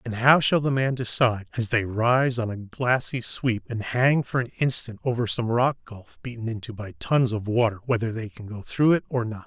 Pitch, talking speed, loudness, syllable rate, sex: 115 Hz, 230 wpm, -24 LUFS, 5.1 syllables/s, male